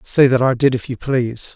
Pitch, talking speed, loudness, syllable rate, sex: 125 Hz, 270 wpm, -17 LUFS, 5.5 syllables/s, male